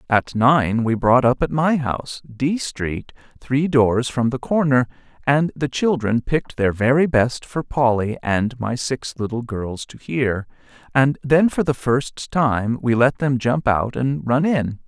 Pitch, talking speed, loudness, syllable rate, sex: 130 Hz, 180 wpm, -20 LUFS, 3.9 syllables/s, male